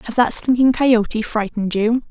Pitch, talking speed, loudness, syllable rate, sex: 230 Hz, 170 wpm, -17 LUFS, 5.0 syllables/s, female